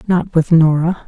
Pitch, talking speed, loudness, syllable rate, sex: 165 Hz, 165 wpm, -14 LUFS, 4.7 syllables/s, female